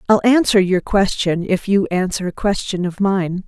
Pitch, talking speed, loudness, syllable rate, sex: 195 Hz, 190 wpm, -17 LUFS, 4.6 syllables/s, female